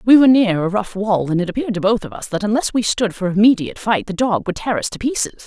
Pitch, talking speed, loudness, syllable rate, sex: 210 Hz, 295 wpm, -17 LUFS, 6.6 syllables/s, female